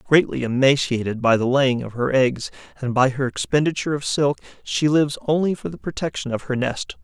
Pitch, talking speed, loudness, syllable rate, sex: 135 Hz, 195 wpm, -21 LUFS, 5.5 syllables/s, male